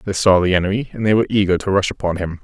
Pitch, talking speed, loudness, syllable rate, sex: 95 Hz, 295 wpm, -17 LUFS, 7.5 syllables/s, male